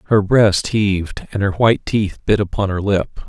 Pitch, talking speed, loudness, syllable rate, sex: 100 Hz, 200 wpm, -17 LUFS, 4.8 syllables/s, male